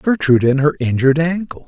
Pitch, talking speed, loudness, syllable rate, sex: 150 Hz, 180 wpm, -15 LUFS, 6.3 syllables/s, male